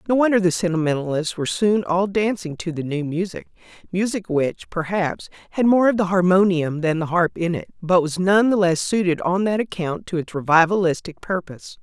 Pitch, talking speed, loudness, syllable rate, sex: 180 Hz, 190 wpm, -20 LUFS, 5.4 syllables/s, female